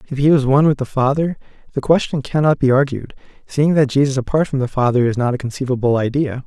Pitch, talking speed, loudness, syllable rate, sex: 135 Hz, 225 wpm, -17 LUFS, 6.4 syllables/s, male